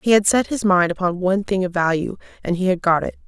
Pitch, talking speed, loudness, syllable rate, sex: 185 Hz, 275 wpm, -19 LUFS, 6.3 syllables/s, female